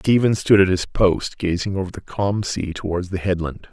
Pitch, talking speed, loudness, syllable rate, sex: 95 Hz, 210 wpm, -20 LUFS, 4.9 syllables/s, male